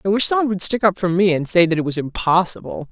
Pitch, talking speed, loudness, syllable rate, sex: 185 Hz, 290 wpm, -18 LUFS, 6.8 syllables/s, female